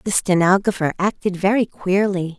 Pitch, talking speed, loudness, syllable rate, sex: 190 Hz, 125 wpm, -19 LUFS, 5.0 syllables/s, female